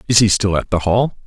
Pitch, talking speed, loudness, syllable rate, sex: 100 Hz, 285 wpm, -16 LUFS, 5.9 syllables/s, male